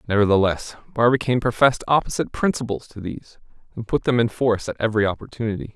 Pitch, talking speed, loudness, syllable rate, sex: 110 Hz, 155 wpm, -21 LUFS, 7.1 syllables/s, male